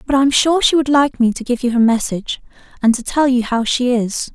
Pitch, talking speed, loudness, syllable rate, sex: 250 Hz, 275 wpm, -16 LUFS, 5.8 syllables/s, female